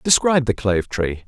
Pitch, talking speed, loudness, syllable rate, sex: 125 Hz, 190 wpm, -19 LUFS, 6.4 syllables/s, male